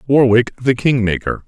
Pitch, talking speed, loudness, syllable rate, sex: 120 Hz, 120 wpm, -15 LUFS, 4.6 syllables/s, male